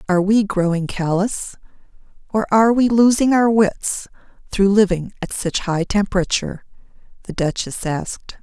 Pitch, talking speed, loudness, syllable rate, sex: 200 Hz, 135 wpm, -18 LUFS, 4.8 syllables/s, female